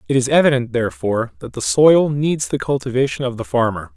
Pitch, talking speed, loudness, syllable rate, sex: 130 Hz, 195 wpm, -17 LUFS, 6.0 syllables/s, male